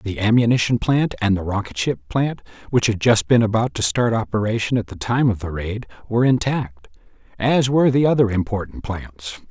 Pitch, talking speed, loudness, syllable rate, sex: 110 Hz, 190 wpm, -20 LUFS, 5.3 syllables/s, male